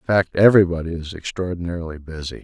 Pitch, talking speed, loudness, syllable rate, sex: 85 Hz, 150 wpm, -20 LUFS, 6.7 syllables/s, male